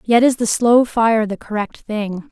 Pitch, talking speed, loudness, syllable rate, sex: 225 Hz, 210 wpm, -17 LUFS, 4.1 syllables/s, female